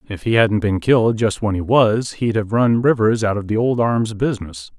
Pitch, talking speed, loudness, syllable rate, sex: 110 Hz, 240 wpm, -17 LUFS, 5.0 syllables/s, male